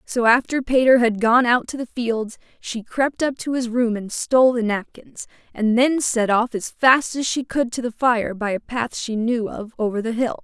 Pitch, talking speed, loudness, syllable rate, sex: 235 Hz, 230 wpm, -20 LUFS, 4.6 syllables/s, female